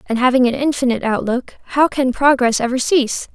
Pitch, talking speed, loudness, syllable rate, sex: 255 Hz, 180 wpm, -16 LUFS, 5.9 syllables/s, female